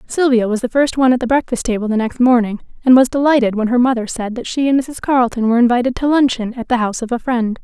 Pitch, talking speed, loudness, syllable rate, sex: 245 Hz, 265 wpm, -15 LUFS, 6.8 syllables/s, female